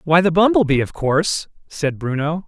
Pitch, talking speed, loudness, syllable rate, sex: 160 Hz, 195 wpm, -18 LUFS, 5.1 syllables/s, male